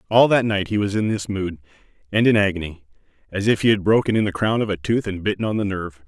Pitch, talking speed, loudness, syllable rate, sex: 100 Hz, 265 wpm, -20 LUFS, 6.6 syllables/s, male